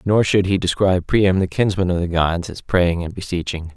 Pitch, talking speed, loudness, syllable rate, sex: 90 Hz, 225 wpm, -19 LUFS, 5.2 syllables/s, male